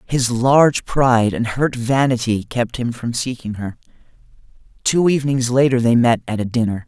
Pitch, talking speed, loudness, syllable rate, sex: 120 Hz, 165 wpm, -17 LUFS, 5.0 syllables/s, male